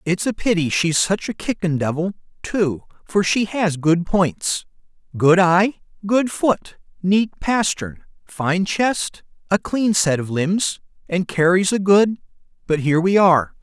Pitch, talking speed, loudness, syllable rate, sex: 185 Hz, 145 wpm, -19 LUFS, 4.0 syllables/s, male